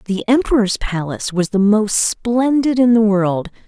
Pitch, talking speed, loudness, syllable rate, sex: 215 Hz, 165 wpm, -16 LUFS, 4.5 syllables/s, female